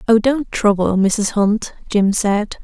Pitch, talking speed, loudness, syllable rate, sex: 210 Hz, 160 wpm, -17 LUFS, 3.5 syllables/s, female